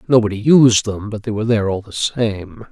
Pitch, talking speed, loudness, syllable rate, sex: 110 Hz, 220 wpm, -16 LUFS, 5.5 syllables/s, male